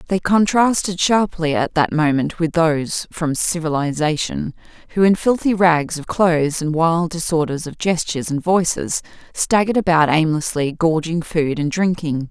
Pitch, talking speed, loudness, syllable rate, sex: 165 Hz, 145 wpm, -18 LUFS, 4.7 syllables/s, female